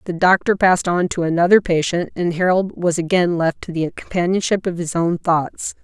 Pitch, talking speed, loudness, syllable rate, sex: 175 Hz, 195 wpm, -18 LUFS, 5.2 syllables/s, female